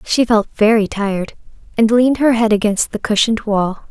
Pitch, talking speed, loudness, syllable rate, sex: 220 Hz, 185 wpm, -15 LUFS, 5.4 syllables/s, female